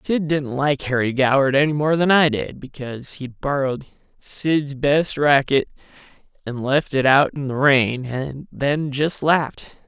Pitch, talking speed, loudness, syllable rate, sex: 140 Hz, 165 wpm, -19 LUFS, 4.2 syllables/s, male